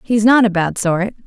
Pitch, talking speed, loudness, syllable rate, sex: 210 Hz, 235 wpm, -15 LUFS, 4.7 syllables/s, female